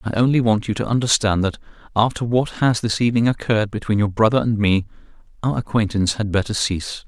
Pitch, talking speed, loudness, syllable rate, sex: 110 Hz, 195 wpm, -19 LUFS, 6.3 syllables/s, male